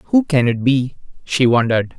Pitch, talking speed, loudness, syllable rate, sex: 135 Hz, 180 wpm, -16 LUFS, 4.8 syllables/s, male